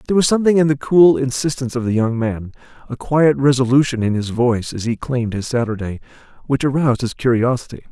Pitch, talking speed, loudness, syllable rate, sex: 130 Hz, 195 wpm, -17 LUFS, 6.5 syllables/s, male